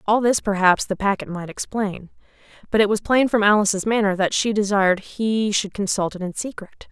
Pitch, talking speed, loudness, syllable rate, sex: 205 Hz, 200 wpm, -20 LUFS, 5.4 syllables/s, female